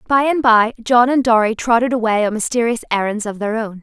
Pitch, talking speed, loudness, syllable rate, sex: 230 Hz, 220 wpm, -16 LUFS, 5.7 syllables/s, female